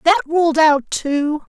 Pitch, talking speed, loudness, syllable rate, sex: 305 Hz, 150 wpm, -16 LUFS, 3.2 syllables/s, female